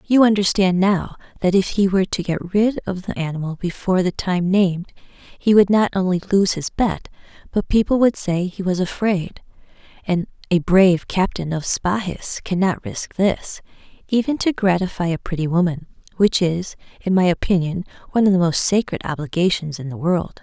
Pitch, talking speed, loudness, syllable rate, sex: 185 Hz, 175 wpm, -19 LUFS, 5.1 syllables/s, female